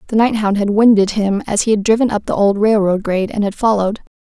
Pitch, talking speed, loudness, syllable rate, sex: 210 Hz, 240 wpm, -15 LUFS, 6.3 syllables/s, female